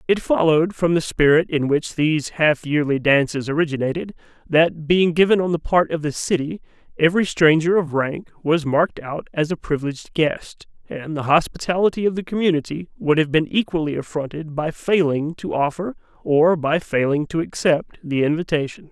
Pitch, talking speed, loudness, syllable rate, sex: 160 Hz, 170 wpm, -20 LUFS, 5.3 syllables/s, male